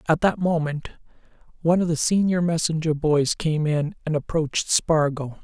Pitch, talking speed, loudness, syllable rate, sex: 160 Hz, 155 wpm, -22 LUFS, 4.9 syllables/s, male